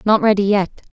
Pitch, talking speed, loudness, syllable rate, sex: 200 Hz, 190 wpm, -16 LUFS, 6.4 syllables/s, female